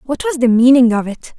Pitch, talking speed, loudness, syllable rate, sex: 240 Hz, 260 wpm, -12 LUFS, 5.8 syllables/s, female